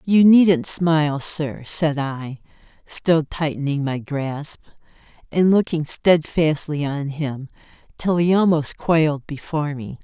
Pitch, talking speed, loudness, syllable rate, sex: 155 Hz, 125 wpm, -20 LUFS, 3.8 syllables/s, female